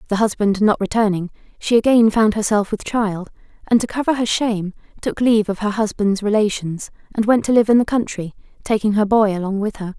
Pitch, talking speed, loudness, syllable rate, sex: 210 Hz, 205 wpm, -18 LUFS, 5.8 syllables/s, female